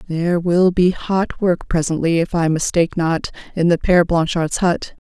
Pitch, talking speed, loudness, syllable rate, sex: 170 Hz, 175 wpm, -18 LUFS, 4.9 syllables/s, female